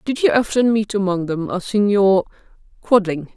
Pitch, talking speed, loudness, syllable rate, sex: 200 Hz, 145 wpm, -18 LUFS, 4.9 syllables/s, female